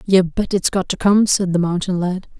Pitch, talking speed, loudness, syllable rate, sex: 185 Hz, 250 wpm, -18 LUFS, 5.0 syllables/s, female